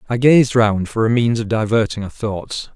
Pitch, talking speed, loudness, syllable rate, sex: 110 Hz, 220 wpm, -17 LUFS, 4.8 syllables/s, male